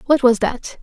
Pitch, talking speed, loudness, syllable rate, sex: 250 Hz, 220 wpm, -17 LUFS, 4.6 syllables/s, female